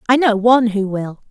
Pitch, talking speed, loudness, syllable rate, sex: 220 Hz, 230 wpm, -15 LUFS, 5.7 syllables/s, female